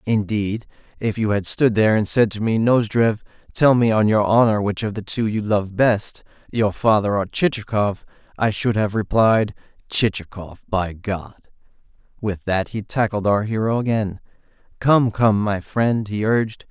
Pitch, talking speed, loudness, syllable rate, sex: 105 Hz, 165 wpm, -20 LUFS, 4.5 syllables/s, male